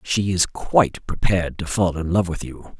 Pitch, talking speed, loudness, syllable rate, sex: 90 Hz, 215 wpm, -21 LUFS, 4.9 syllables/s, male